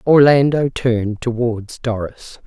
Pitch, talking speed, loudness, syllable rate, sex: 120 Hz, 95 wpm, -17 LUFS, 3.9 syllables/s, female